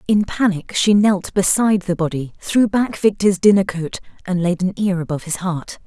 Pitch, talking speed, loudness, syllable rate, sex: 190 Hz, 195 wpm, -18 LUFS, 5.1 syllables/s, female